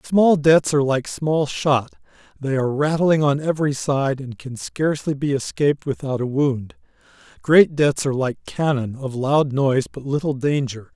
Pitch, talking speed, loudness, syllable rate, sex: 140 Hz, 170 wpm, -20 LUFS, 4.8 syllables/s, male